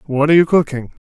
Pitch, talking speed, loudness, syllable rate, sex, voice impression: 150 Hz, 220 wpm, -14 LUFS, 7.4 syllables/s, male, slightly masculine, adult-like, slightly weak, slightly calm, slightly unique, kind